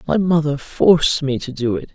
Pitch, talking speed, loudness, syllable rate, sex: 135 Hz, 215 wpm, -17 LUFS, 5.1 syllables/s, male